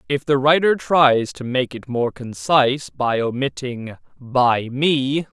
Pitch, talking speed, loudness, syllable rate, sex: 130 Hz, 145 wpm, -19 LUFS, 3.7 syllables/s, male